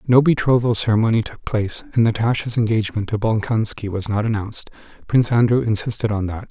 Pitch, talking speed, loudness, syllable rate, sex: 110 Hz, 165 wpm, -19 LUFS, 6.3 syllables/s, male